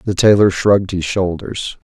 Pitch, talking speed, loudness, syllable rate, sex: 95 Hz, 155 wpm, -15 LUFS, 4.5 syllables/s, male